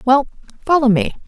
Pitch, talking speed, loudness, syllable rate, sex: 265 Hz, 140 wpm, -16 LUFS, 5.6 syllables/s, female